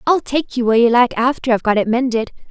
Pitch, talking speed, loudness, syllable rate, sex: 240 Hz, 265 wpm, -16 LUFS, 6.8 syllables/s, female